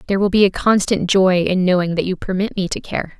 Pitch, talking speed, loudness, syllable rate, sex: 185 Hz, 265 wpm, -17 LUFS, 6.0 syllables/s, female